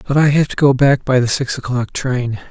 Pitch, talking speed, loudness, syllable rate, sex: 130 Hz, 265 wpm, -15 LUFS, 5.3 syllables/s, male